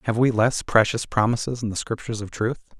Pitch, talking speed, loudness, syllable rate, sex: 115 Hz, 215 wpm, -23 LUFS, 6.1 syllables/s, male